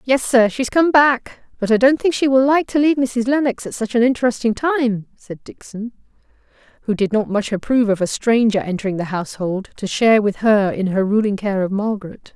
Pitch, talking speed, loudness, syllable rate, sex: 225 Hz, 215 wpm, -17 LUFS, 5.6 syllables/s, female